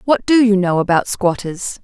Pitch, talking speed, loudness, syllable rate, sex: 200 Hz, 195 wpm, -15 LUFS, 4.7 syllables/s, female